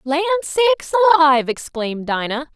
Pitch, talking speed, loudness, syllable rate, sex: 310 Hz, 115 wpm, -17 LUFS, 6.4 syllables/s, female